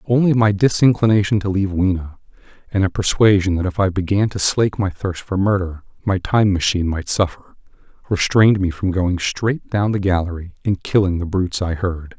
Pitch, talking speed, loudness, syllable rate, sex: 95 Hz, 185 wpm, -18 LUFS, 5.5 syllables/s, male